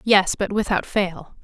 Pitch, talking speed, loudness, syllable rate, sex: 195 Hz, 165 wpm, -21 LUFS, 3.9 syllables/s, female